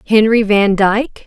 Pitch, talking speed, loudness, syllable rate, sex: 215 Hz, 140 wpm, -13 LUFS, 4.4 syllables/s, female